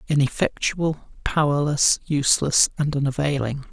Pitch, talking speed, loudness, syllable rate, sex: 145 Hz, 80 wpm, -21 LUFS, 4.6 syllables/s, male